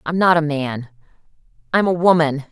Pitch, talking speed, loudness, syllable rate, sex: 155 Hz, 145 wpm, -17 LUFS, 5.1 syllables/s, female